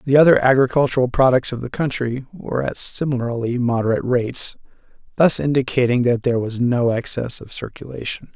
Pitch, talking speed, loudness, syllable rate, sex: 125 Hz, 150 wpm, -19 LUFS, 5.9 syllables/s, male